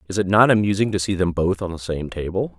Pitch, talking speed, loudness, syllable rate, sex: 95 Hz, 280 wpm, -20 LUFS, 6.3 syllables/s, male